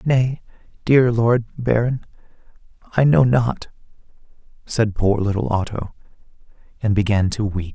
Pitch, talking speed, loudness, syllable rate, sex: 115 Hz, 115 wpm, -19 LUFS, 4.2 syllables/s, male